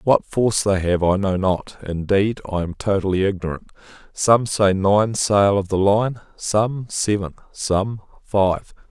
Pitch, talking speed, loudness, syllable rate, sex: 100 Hz, 155 wpm, -20 LUFS, 4.0 syllables/s, male